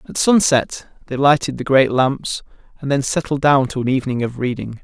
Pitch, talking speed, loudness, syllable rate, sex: 135 Hz, 200 wpm, -17 LUFS, 5.1 syllables/s, male